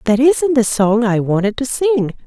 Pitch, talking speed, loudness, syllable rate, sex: 240 Hz, 210 wpm, -15 LUFS, 4.4 syllables/s, female